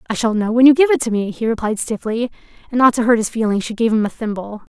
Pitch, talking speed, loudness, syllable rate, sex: 230 Hz, 290 wpm, -17 LUFS, 6.6 syllables/s, female